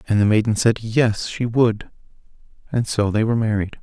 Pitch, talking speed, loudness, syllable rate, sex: 110 Hz, 190 wpm, -19 LUFS, 5.3 syllables/s, male